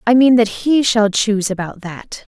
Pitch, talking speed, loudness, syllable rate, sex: 220 Hz, 205 wpm, -15 LUFS, 4.6 syllables/s, female